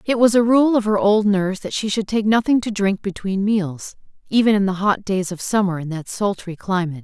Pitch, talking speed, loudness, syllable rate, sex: 200 Hz, 240 wpm, -19 LUFS, 5.4 syllables/s, female